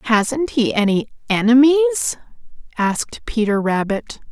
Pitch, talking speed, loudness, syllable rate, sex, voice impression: 245 Hz, 95 wpm, -18 LUFS, 4.8 syllables/s, female, feminine, adult-like, slightly soft, slightly calm, friendly, slightly elegant